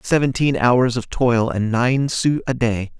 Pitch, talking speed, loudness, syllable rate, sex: 120 Hz, 180 wpm, -18 LUFS, 4.0 syllables/s, male